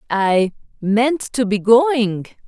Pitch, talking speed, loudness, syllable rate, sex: 225 Hz, 120 wpm, -17 LUFS, 2.8 syllables/s, female